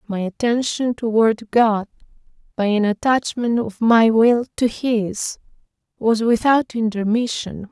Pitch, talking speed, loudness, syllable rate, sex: 225 Hz, 115 wpm, -19 LUFS, 3.9 syllables/s, female